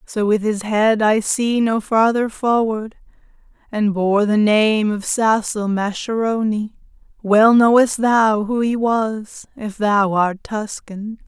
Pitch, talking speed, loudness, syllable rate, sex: 215 Hz, 140 wpm, -17 LUFS, 3.5 syllables/s, female